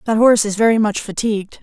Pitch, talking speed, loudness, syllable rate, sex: 215 Hz, 220 wpm, -16 LUFS, 6.8 syllables/s, female